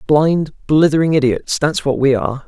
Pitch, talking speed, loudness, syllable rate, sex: 145 Hz, 145 wpm, -15 LUFS, 4.7 syllables/s, male